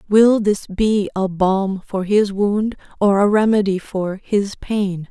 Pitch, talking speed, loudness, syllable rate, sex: 200 Hz, 165 wpm, -18 LUFS, 3.5 syllables/s, female